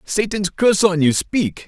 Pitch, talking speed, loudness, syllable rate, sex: 190 Hz, 180 wpm, -17 LUFS, 4.5 syllables/s, male